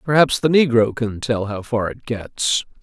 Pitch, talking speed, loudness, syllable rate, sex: 120 Hz, 190 wpm, -19 LUFS, 4.3 syllables/s, male